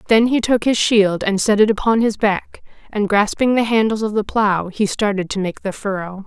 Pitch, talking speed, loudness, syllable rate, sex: 210 Hz, 230 wpm, -17 LUFS, 5.0 syllables/s, female